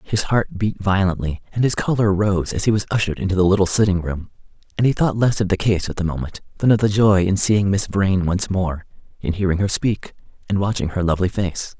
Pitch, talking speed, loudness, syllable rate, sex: 95 Hz, 235 wpm, -19 LUFS, 5.8 syllables/s, male